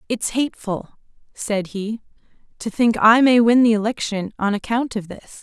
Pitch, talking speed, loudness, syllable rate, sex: 220 Hz, 165 wpm, -19 LUFS, 4.7 syllables/s, female